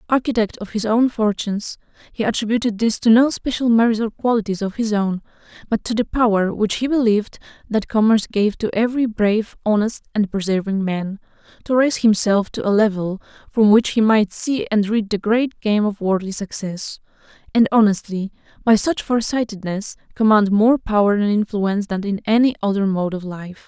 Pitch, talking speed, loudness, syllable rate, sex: 215 Hz, 180 wpm, -19 LUFS, 5.4 syllables/s, female